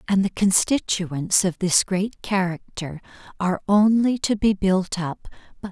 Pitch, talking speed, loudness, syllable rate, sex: 190 Hz, 145 wpm, -21 LUFS, 4.2 syllables/s, female